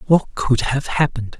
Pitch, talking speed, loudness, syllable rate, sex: 135 Hz, 170 wpm, -19 LUFS, 5.0 syllables/s, male